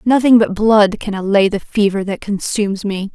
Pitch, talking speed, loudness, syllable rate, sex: 205 Hz, 190 wpm, -15 LUFS, 5.0 syllables/s, female